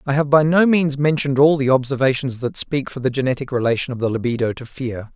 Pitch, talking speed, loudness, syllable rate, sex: 135 Hz, 235 wpm, -19 LUFS, 6.2 syllables/s, male